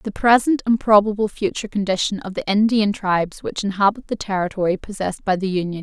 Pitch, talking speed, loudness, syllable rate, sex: 200 Hz, 185 wpm, -20 LUFS, 6.0 syllables/s, female